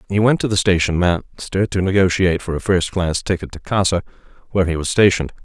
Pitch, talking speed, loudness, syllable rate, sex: 90 Hz, 200 wpm, -18 LUFS, 6.4 syllables/s, male